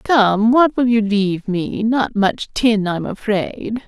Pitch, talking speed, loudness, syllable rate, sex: 220 Hz, 170 wpm, -17 LUFS, 3.5 syllables/s, female